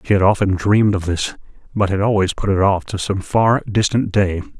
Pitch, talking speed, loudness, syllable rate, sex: 100 Hz, 220 wpm, -17 LUFS, 5.3 syllables/s, male